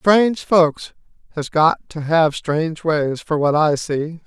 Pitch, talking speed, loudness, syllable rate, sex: 160 Hz, 170 wpm, -18 LUFS, 3.8 syllables/s, male